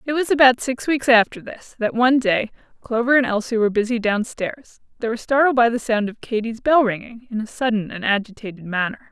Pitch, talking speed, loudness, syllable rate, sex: 230 Hz, 215 wpm, -19 LUFS, 5.8 syllables/s, female